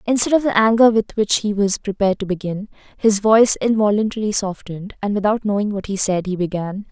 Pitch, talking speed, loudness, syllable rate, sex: 205 Hz, 200 wpm, -18 LUFS, 6.1 syllables/s, female